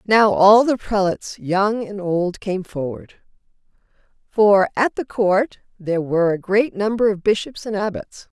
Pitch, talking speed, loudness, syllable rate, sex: 200 Hz, 155 wpm, -19 LUFS, 4.3 syllables/s, female